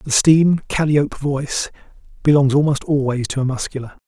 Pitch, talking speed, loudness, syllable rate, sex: 140 Hz, 145 wpm, -18 LUFS, 5.3 syllables/s, male